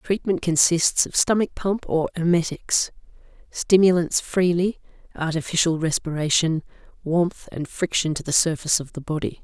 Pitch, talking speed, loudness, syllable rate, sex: 165 Hz, 125 wpm, -22 LUFS, 4.8 syllables/s, female